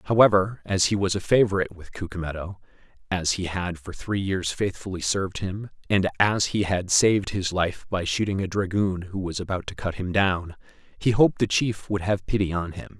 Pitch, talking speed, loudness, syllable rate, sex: 95 Hz, 205 wpm, -24 LUFS, 5.3 syllables/s, male